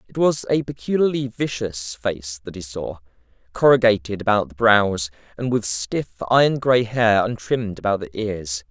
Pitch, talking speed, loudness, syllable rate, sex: 110 Hz, 160 wpm, -21 LUFS, 4.7 syllables/s, male